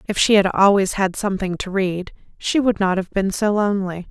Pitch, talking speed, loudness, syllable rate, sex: 195 Hz, 220 wpm, -19 LUFS, 5.4 syllables/s, female